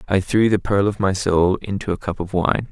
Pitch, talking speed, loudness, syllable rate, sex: 95 Hz, 265 wpm, -20 LUFS, 5.2 syllables/s, male